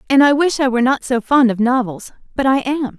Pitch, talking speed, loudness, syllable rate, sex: 255 Hz, 260 wpm, -16 LUFS, 5.8 syllables/s, female